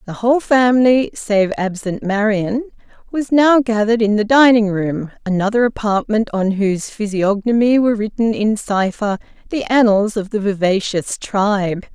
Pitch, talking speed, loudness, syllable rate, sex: 215 Hz, 140 wpm, -16 LUFS, 4.5 syllables/s, female